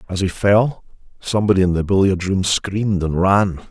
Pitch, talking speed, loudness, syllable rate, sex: 95 Hz, 180 wpm, -17 LUFS, 5.0 syllables/s, male